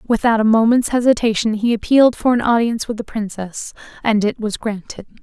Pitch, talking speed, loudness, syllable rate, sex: 225 Hz, 185 wpm, -17 LUFS, 5.7 syllables/s, female